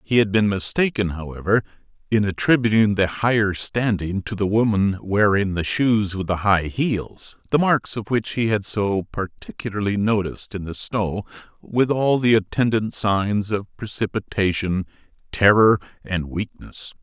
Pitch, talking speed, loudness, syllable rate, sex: 105 Hz, 150 wpm, -21 LUFS, 4.4 syllables/s, male